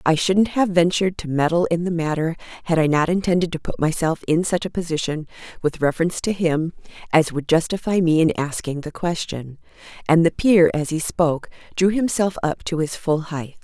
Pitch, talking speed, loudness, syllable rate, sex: 165 Hz, 200 wpm, -21 LUFS, 5.5 syllables/s, female